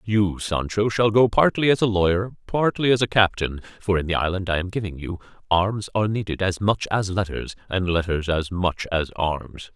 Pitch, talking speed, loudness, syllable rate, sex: 95 Hz, 205 wpm, -22 LUFS, 5.0 syllables/s, male